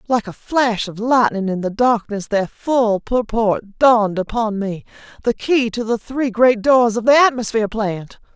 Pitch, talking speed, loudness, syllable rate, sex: 225 Hz, 170 wpm, -17 LUFS, 4.3 syllables/s, female